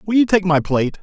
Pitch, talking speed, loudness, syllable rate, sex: 180 Hz, 290 wpm, -16 LUFS, 6.2 syllables/s, male